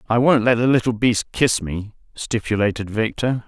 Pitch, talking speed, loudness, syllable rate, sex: 115 Hz, 175 wpm, -19 LUFS, 4.9 syllables/s, male